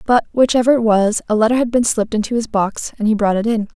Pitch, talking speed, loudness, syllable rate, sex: 225 Hz, 270 wpm, -16 LUFS, 6.5 syllables/s, female